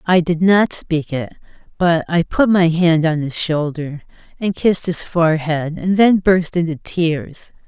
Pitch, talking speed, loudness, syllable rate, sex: 170 Hz, 170 wpm, -17 LUFS, 4.2 syllables/s, female